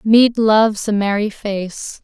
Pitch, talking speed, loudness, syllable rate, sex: 210 Hz, 150 wpm, -16 LUFS, 3.6 syllables/s, female